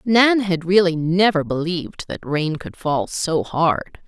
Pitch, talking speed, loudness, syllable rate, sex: 170 Hz, 160 wpm, -19 LUFS, 3.8 syllables/s, female